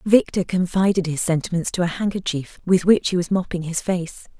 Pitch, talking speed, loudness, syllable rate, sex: 180 Hz, 190 wpm, -21 LUFS, 5.5 syllables/s, female